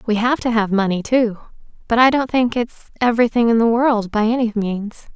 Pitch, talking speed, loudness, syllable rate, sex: 230 Hz, 200 wpm, -17 LUFS, 5.3 syllables/s, female